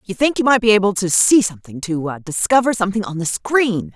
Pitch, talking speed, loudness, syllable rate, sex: 200 Hz, 230 wpm, -17 LUFS, 5.9 syllables/s, female